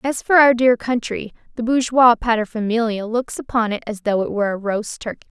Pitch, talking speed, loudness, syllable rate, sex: 230 Hz, 200 wpm, -18 LUFS, 5.5 syllables/s, female